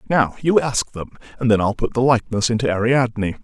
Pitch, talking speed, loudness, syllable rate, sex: 115 Hz, 210 wpm, -19 LUFS, 6.0 syllables/s, male